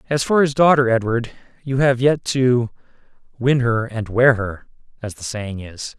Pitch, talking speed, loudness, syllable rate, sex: 125 Hz, 180 wpm, -18 LUFS, 4.4 syllables/s, male